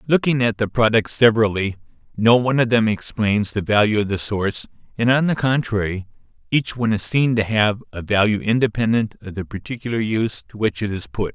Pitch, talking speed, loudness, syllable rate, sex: 110 Hz, 195 wpm, -19 LUFS, 5.8 syllables/s, male